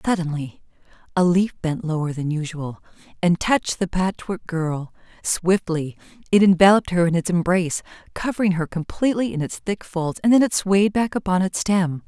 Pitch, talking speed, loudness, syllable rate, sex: 180 Hz, 170 wpm, -21 LUFS, 5.2 syllables/s, female